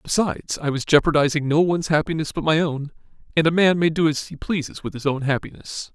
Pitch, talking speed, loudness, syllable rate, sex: 155 Hz, 220 wpm, -21 LUFS, 6.1 syllables/s, male